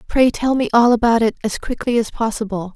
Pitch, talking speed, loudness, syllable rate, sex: 230 Hz, 220 wpm, -17 LUFS, 5.7 syllables/s, female